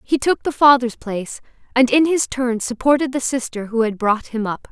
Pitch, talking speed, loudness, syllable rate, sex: 250 Hz, 215 wpm, -18 LUFS, 5.2 syllables/s, female